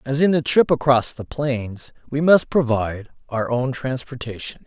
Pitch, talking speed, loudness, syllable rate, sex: 130 Hz, 165 wpm, -20 LUFS, 4.5 syllables/s, male